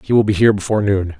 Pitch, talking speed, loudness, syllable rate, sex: 100 Hz, 305 wpm, -16 LUFS, 8.3 syllables/s, male